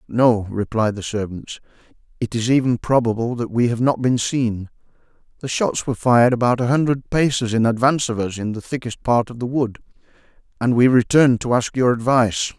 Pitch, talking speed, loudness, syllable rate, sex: 120 Hz, 190 wpm, -19 LUFS, 5.6 syllables/s, male